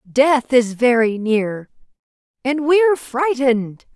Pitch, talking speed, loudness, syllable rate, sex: 255 Hz, 120 wpm, -17 LUFS, 4.1 syllables/s, female